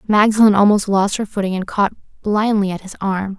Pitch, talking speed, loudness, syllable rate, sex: 200 Hz, 195 wpm, -17 LUFS, 5.5 syllables/s, female